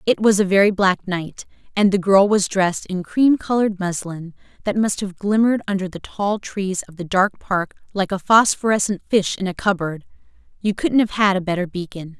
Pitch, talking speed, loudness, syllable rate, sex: 195 Hz, 200 wpm, -19 LUFS, 5.2 syllables/s, female